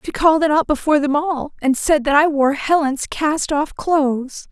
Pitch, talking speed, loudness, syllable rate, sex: 295 Hz, 215 wpm, -17 LUFS, 4.9 syllables/s, female